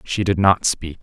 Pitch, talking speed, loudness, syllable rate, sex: 90 Hz, 235 wpm, -18 LUFS, 4.4 syllables/s, male